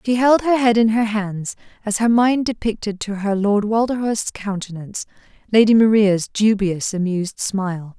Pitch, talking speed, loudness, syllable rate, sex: 210 Hz, 160 wpm, -18 LUFS, 4.8 syllables/s, female